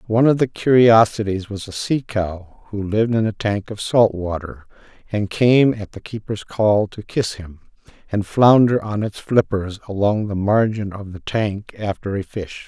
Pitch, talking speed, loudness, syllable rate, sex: 105 Hz, 185 wpm, -19 LUFS, 4.5 syllables/s, male